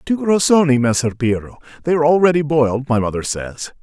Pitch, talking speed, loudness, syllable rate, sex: 140 Hz, 190 wpm, -16 LUFS, 5.8 syllables/s, male